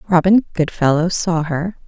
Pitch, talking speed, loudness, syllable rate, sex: 170 Hz, 130 wpm, -17 LUFS, 4.5 syllables/s, female